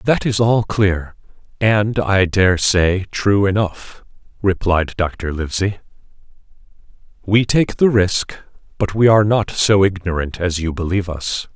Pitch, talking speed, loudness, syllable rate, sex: 95 Hz, 140 wpm, -17 LUFS, 4.1 syllables/s, male